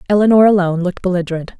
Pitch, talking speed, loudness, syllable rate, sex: 185 Hz, 150 wpm, -14 LUFS, 8.8 syllables/s, female